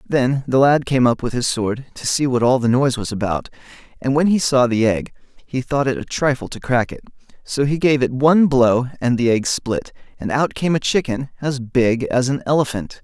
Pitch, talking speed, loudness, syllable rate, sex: 130 Hz, 230 wpm, -18 LUFS, 5.1 syllables/s, male